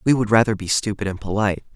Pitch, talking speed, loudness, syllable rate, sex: 105 Hz, 240 wpm, -20 LUFS, 7.0 syllables/s, male